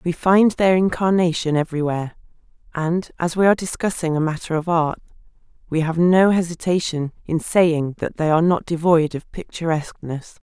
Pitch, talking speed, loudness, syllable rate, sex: 170 Hz, 155 wpm, -20 LUFS, 5.3 syllables/s, female